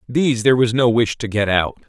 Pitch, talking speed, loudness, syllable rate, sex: 120 Hz, 255 wpm, -17 LUFS, 6.2 syllables/s, male